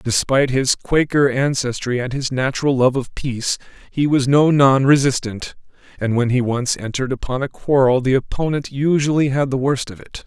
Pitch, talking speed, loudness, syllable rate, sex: 130 Hz, 180 wpm, -18 LUFS, 5.2 syllables/s, male